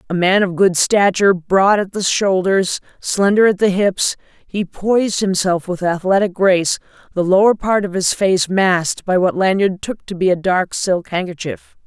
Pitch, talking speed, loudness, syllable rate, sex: 190 Hz, 175 wpm, -16 LUFS, 4.6 syllables/s, female